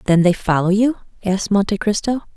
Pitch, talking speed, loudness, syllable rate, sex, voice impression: 200 Hz, 180 wpm, -18 LUFS, 6.1 syllables/s, female, feminine, adult-like, slightly relaxed, soft, fluent, slightly raspy, slightly intellectual, calm, elegant, kind, modest